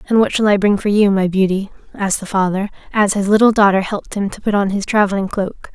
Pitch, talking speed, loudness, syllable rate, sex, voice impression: 200 Hz, 250 wpm, -16 LUFS, 6.3 syllables/s, female, feminine, slightly young, slightly fluent, slightly cute, slightly calm, friendly, slightly sweet, slightly kind